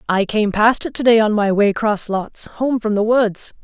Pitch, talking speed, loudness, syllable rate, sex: 215 Hz, 230 wpm, -17 LUFS, 4.4 syllables/s, female